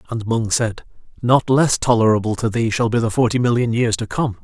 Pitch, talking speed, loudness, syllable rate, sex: 115 Hz, 215 wpm, -18 LUFS, 5.5 syllables/s, male